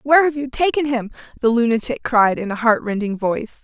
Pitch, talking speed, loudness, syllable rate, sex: 245 Hz, 200 wpm, -19 LUFS, 6.0 syllables/s, female